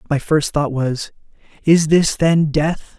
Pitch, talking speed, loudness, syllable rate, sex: 155 Hz, 160 wpm, -17 LUFS, 3.5 syllables/s, male